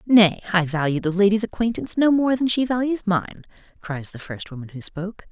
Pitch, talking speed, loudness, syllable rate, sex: 200 Hz, 205 wpm, -22 LUFS, 5.7 syllables/s, female